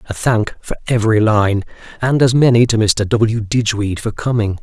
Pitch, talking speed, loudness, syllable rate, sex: 110 Hz, 180 wpm, -15 LUFS, 4.8 syllables/s, male